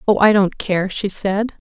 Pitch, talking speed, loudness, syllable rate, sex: 200 Hz, 215 wpm, -18 LUFS, 4.1 syllables/s, female